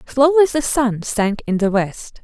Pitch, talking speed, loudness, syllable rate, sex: 240 Hz, 190 wpm, -17 LUFS, 4.4 syllables/s, female